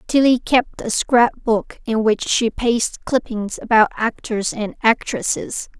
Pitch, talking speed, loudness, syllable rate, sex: 230 Hz, 135 wpm, -19 LUFS, 3.9 syllables/s, female